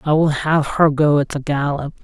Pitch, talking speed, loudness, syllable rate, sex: 150 Hz, 235 wpm, -17 LUFS, 4.8 syllables/s, male